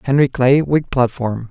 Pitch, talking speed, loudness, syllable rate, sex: 130 Hz, 160 wpm, -16 LUFS, 4.3 syllables/s, male